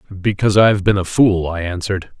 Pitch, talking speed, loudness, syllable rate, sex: 95 Hz, 220 wpm, -16 LUFS, 6.2 syllables/s, male